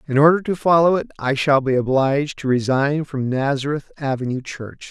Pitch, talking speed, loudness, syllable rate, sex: 140 Hz, 185 wpm, -19 LUFS, 5.3 syllables/s, male